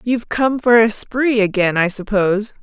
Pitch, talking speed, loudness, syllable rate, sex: 220 Hz, 185 wpm, -16 LUFS, 4.9 syllables/s, female